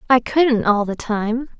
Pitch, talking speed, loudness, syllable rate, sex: 235 Hz, 150 wpm, -18 LUFS, 3.8 syllables/s, female